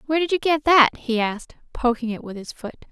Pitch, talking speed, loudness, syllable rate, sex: 260 Hz, 245 wpm, -20 LUFS, 6.1 syllables/s, female